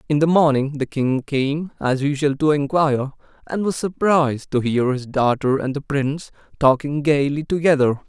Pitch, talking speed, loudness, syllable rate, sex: 145 Hz, 170 wpm, -20 LUFS, 4.9 syllables/s, male